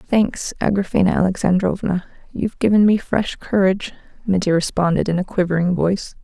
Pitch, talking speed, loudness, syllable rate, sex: 190 Hz, 135 wpm, -19 LUFS, 5.6 syllables/s, female